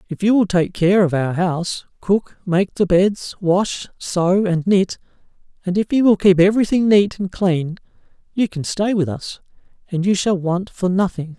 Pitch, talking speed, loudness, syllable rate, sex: 185 Hz, 190 wpm, -18 LUFS, 4.5 syllables/s, male